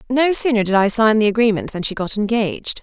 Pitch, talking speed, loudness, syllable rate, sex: 215 Hz, 235 wpm, -17 LUFS, 6.1 syllables/s, female